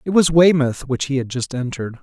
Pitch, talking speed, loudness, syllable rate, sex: 140 Hz, 235 wpm, -18 LUFS, 5.7 syllables/s, male